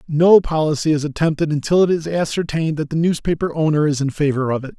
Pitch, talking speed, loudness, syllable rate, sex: 155 Hz, 215 wpm, -18 LUFS, 6.3 syllables/s, male